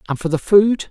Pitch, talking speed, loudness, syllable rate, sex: 185 Hz, 265 wpm, -15 LUFS, 5.5 syllables/s, male